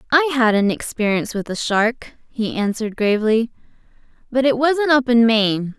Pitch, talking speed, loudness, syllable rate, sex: 235 Hz, 165 wpm, -18 LUFS, 5.2 syllables/s, female